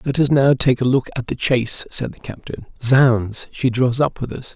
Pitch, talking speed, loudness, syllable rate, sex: 125 Hz, 235 wpm, -18 LUFS, 4.8 syllables/s, male